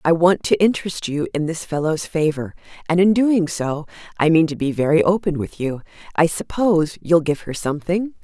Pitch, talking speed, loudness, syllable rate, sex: 170 Hz, 195 wpm, -19 LUFS, 5.4 syllables/s, female